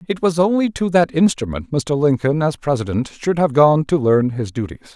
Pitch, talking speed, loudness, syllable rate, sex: 145 Hz, 205 wpm, -17 LUFS, 5.3 syllables/s, male